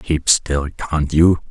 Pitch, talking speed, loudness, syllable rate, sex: 75 Hz, 160 wpm, -17 LUFS, 3.1 syllables/s, male